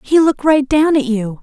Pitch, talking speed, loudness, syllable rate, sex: 275 Hz, 255 wpm, -14 LUFS, 5.3 syllables/s, female